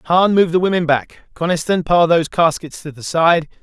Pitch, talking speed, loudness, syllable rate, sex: 165 Hz, 200 wpm, -16 LUFS, 5.2 syllables/s, male